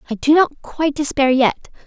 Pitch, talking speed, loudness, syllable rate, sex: 280 Hz, 195 wpm, -17 LUFS, 5.2 syllables/s, female